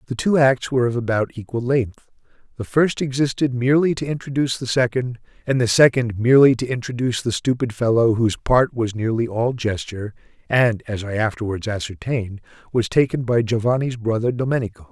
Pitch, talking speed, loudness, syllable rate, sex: 120 Hz, 170 wpm, -20 LUFS, 5.9 syllables/s, male